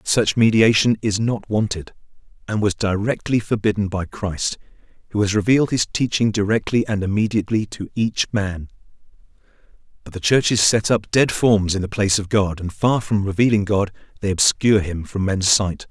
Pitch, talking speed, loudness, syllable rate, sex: 105 Hz, 170 wpm, -19 LUFS, 5.2 syllables/s, male